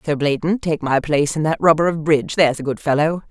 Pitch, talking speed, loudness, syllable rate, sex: 155 Hz, 235 wpm, -18 LUFS, 6.4 syllables/s, female